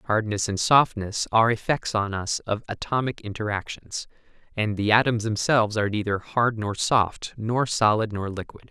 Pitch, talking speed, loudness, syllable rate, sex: 110 Hz, 160 wpm, -24 LUFS, 4.9 syllables/s, male